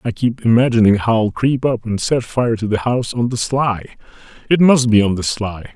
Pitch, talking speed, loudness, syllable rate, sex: 115 Hz, 230 wpm, -16 LUFS, 5.3 syllables/s, male